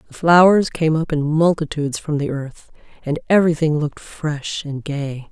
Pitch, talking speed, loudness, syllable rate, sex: 155 Hz, 170 wpm, -18 LUFS, 4.9 syllables/s, female